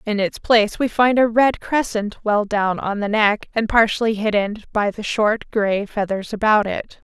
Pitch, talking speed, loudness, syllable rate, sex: 215 Hz, 195 wpm, -19 LUFS, 4.5 syllables/s, female